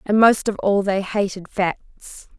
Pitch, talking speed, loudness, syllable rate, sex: 200 Hz, 175 wpm, -20 LUFS, 3.6 syllables/s, female